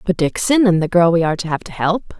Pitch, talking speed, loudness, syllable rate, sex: 180 Hz, 300 wpm, -16 LUFS, 6.3 syllables/s, female